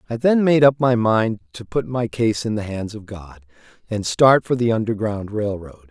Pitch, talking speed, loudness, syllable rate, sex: 110 Hz, 225 wpm, -19 LUFS, 4.7 syllables/s, male